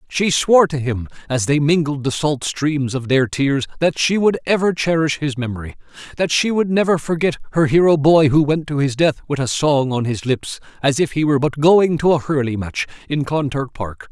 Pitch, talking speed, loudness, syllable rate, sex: 145 Hz, 220 wpm, -18 LUFS, 5.2 syllables/s, male